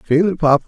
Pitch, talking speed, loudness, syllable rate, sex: 160 Hz, 270 wpm, -16 LUFS, 7.0 syllables/s, male